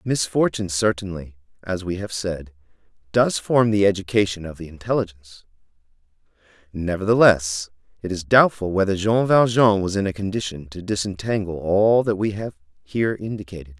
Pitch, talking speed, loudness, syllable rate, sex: 95 Hz, 140 wpm, -21 LUFS, 5.4 syllables/s, male